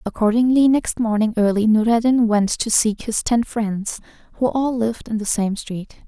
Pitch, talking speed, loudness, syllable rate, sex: 225 Hz, 180 wpm, -19 LUFS, 4.8 syllables/s, female